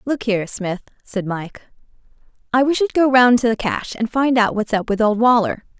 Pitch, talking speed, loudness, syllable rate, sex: 225 Hz, 220 wpm, -18 LUFS, 5.2 syllables/s, female